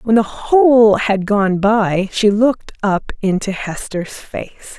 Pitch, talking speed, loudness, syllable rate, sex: 210 Hz, 150 wpm, -15 LUFS, 4.1 syllables/s, female